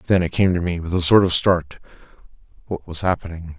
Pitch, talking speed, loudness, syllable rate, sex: 85 Hz, 215 wpm, -19 LUFS, 5.9 syllables/s, male